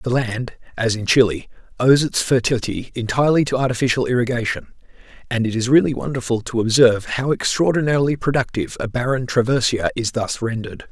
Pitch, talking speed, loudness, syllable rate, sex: 120 Hz, 155 wpm, -19 LUFS, 6.1 syllables/s, male